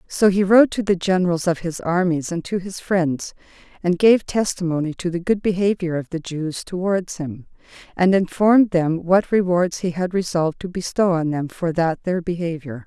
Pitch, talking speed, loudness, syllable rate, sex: 175 Hz, 190 wpm, -20 LUFS, 5.0 syllables/s, female